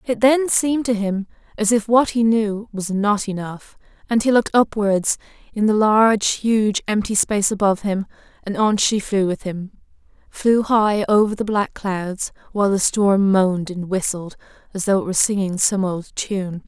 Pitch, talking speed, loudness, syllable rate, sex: 205 Hz, 185 wpm, -19 LUFS, 4.7 syllables/s, female